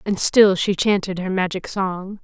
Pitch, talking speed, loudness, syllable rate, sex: 190 Hz, 190 wpm, -19 LUFS, 4.2 syllables/s, female